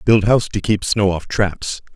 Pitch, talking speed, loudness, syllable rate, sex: 100 Hz, 215 wpm, -18 LUFS, 4.7 syllables/s, male